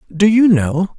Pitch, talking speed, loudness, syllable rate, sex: 185 Hz, 185 wpm, -13 LUFS, 3.9 syllables/s, male